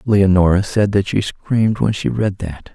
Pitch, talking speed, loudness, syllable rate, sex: 100 Hz, 195 wpm, -16 LUFS, 4.5 syllables/s, male